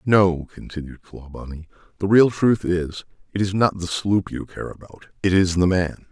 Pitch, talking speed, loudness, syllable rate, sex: 95 Hz, 185 wpm, -21 LUFS, 4.8 syllables/s, male